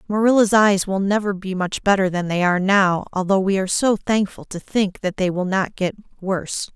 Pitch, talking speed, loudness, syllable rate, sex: 195 Hz, 215 wpm, -19 LUFS, 5.3 syllables/s, female